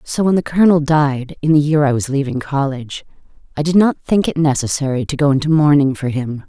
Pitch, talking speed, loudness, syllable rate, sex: 145 Hz, 220 wpm, -16 LUFS, 5.8 syllables/s, female